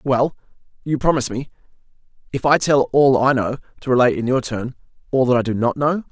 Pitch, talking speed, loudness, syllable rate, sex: 130 Hz, 205 wpm, -19 LUFS, 6.1 syllables/s, male